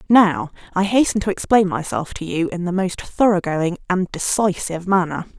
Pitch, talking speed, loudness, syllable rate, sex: 180 Hz, 165 wpm, -19 LUFS, 5.0 syllables/s, female